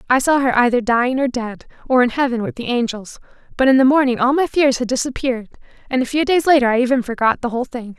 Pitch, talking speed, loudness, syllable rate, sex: 250 Hz, 250 wpm, -17 LUFS, 6.6 syllables/s, female